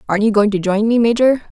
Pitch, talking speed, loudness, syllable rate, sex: 220 Hz, 265 wpm, -15 LUFS, 6.6 syllables/s, female